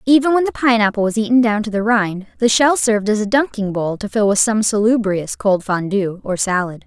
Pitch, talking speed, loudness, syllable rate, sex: 215 Hz, 225 wpm, -16 LUFS, 5.5 syllables/s, female